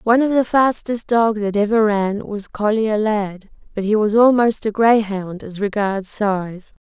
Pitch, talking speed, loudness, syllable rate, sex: 215 Hz, 175 wpm, -18 LUFS, 4.2 syllables/s, female